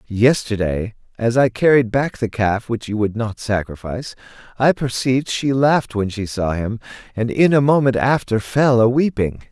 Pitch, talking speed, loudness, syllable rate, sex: 120 Hz, 175 wpm, -18 LUFS, 4.8 syllables/s, male